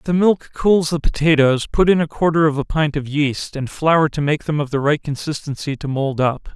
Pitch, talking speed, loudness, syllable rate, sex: 150 Hz, 245 wpm, -18 LUFS, 5.1 syllables/s, male